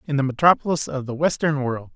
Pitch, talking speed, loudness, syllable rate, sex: 140 Hz, 215 wpm, -21 LUFS, 6.2 syllables/s, male